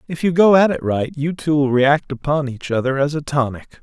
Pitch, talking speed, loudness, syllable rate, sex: 145 Hz, 250 wpm, -18 LUFS, 5.3 syllables/s, male